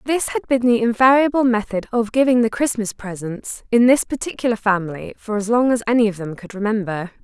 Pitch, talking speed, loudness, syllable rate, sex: 225 Hz, 200 wpm, -19 LUFS, 5.8 syllables/s, female